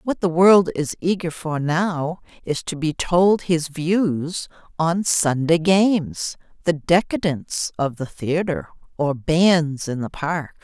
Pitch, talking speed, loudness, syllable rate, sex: 165 Hz, 145 wpm, -20 LUFS, 3.6 syllables/s, female